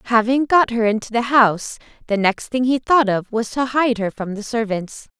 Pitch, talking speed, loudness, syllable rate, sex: 230 Hz, 220 wpm, -18 LUFS, 4.9 syllables/s, female